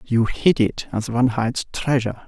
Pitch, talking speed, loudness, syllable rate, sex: 120 Hz, 185 wpm, -21 LUFS, 5.3 syllables/s, male